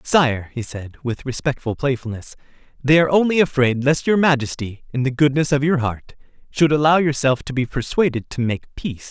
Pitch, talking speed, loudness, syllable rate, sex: 135 Hz, 185 wpm, -19 LUFS, 5.4 syllables/s, male